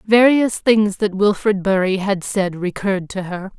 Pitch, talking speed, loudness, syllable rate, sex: 200 Hz, 165 wpm, -18 LUFS, 4.4 syllables/s, female